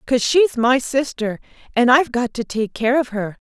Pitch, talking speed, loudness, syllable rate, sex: 245 Hz, 205 wpm, -18 LUFS, 5.1 syllables/s, female